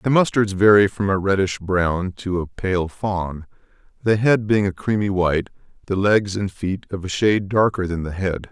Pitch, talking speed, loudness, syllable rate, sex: 95 Hz, 195 wpm, -20 LUFS, 4.7 syllables/s, male